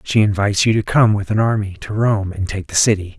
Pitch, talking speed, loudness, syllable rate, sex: 105 Hz, 265 wpm, -17 LUFS, 5.9 syllables/s, male